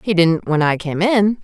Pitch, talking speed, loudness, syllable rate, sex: 180 Hz, 250 wpm, -17 LUFS, 4.5 syllables/s, female